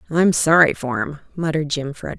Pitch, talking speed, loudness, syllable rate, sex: 150 Hz, 165 wpm, -19 LUFS, 5.6 syllables/s, female